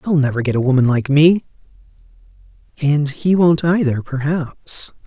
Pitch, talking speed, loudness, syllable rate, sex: 145 Hz, 140 wpm, -16 LUFS, 4.6 syllables/s, male